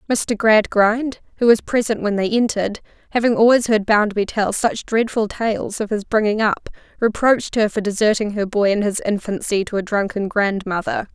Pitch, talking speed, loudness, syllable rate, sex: 215 Hz, 180 wpm, -19 LUFS, 5.1 syllables/s, female